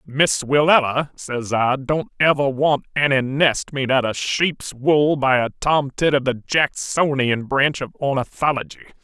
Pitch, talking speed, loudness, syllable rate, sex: 140 Hz, 155 wpm, -19 LUFS, 4.1 syllables/s, male